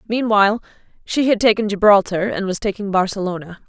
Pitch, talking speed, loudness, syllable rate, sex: 205 Hz, 145 wpm, -17 LUFS, 6.0 syllables/s, female